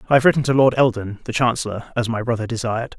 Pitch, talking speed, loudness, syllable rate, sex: 120 Hz, 240 wpm, -19 LUFS, 7.1 syllables/s, male